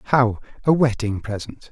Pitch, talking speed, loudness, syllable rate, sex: 120 Hz, 140 wpm, -21 LUFS, 4.2 syllables/s, male